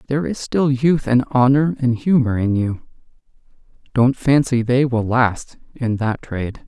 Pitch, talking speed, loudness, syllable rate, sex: 125 Hz, 160 wpm, -18 LUFS, 4.4 syllables/s, male